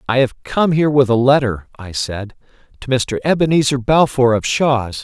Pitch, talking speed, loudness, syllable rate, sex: 130 Hz, 180 wpm, -16 LUFS, 4.9 syllables/s, male